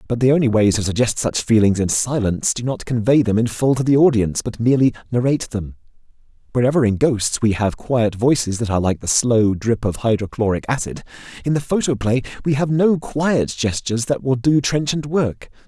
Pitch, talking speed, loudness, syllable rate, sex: 120 Hz, 200 wpm, -18 LUFS, 5.6 syllables/s, male